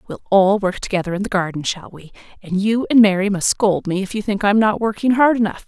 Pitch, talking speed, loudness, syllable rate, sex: 205 Hz, 255 wpm, -17 LUFS, 5.9 syllables/s, female